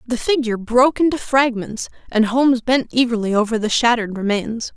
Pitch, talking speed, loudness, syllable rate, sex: 235 Hz, 165 wpm, -18 LUFS, 5.9 syllables/s, female